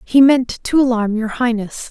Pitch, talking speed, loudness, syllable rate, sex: 240 Hz, 190 wpm, -16 LUFS, 4.4 syllables/s, female